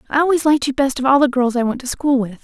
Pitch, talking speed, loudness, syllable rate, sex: 265 Hz, 345 wpm, -17 LUFS, 7.2 syllables/s, female